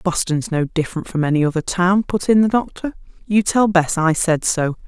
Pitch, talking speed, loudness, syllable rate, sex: 180 Hz, 210 wpm, -18 LUFS, 5.2 syllables/s, female